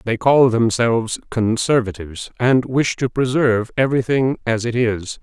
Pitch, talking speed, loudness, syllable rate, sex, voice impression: 120 Hz, 150 wpm, -18 LUFS, 4.8 syllables/s, male, masculine, adult-like, slightly thick, cool, sincere, slightly calm, slightly friendly